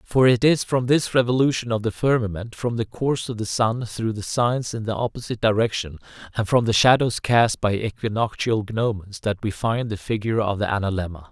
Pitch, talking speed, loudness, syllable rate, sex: 110 Hz, 200 wpm, -22 LUFS, 5.5 syllables/s, male